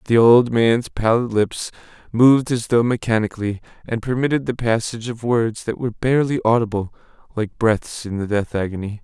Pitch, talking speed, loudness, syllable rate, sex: 115 Hz, 165 wpm, -19 LUFS, 5.5 syllables/s, male